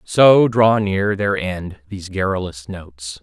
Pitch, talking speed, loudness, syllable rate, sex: 95 Hz, 150 wpm, -17 LUFS, 3.9 syllables/s, male